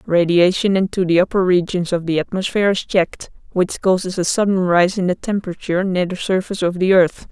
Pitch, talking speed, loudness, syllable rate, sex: 185 Hz, 195 wpm, -17 LUFS, 5.9 syllables/s, female